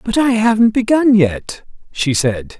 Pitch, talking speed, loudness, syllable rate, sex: 200 Hz, 160 wpm, -14 LUFS, 4.0 syllables/s, male